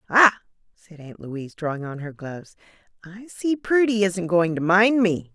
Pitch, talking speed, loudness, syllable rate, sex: 185 Hz, 180 wpm, -21 LUFS, 4.9 syllables/s, female